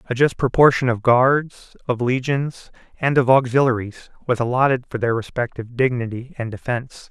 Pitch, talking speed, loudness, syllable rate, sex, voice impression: 125 Hz, 150 wpm, -20 LUFS, 5.2 syllables/s, male, very masculine, middle-aged, thick, slightly tensed, slightly powerful, slightly dark, slightly soft, slightly muffled, slightly fluent, slightly raspy, cool, very intellectual, refreshing, sincere, calm, friendly, reassuring, slightly unique, slightly elegant, slightly wild, sweet, lively, kind, slightly modest